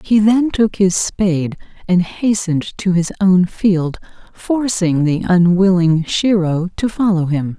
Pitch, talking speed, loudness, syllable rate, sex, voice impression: 185 Hz, 140 wpm, -15 LUFS, 3.9 syllables/s, female, feminine, very adult-like, intellectual, calm, slightly sweet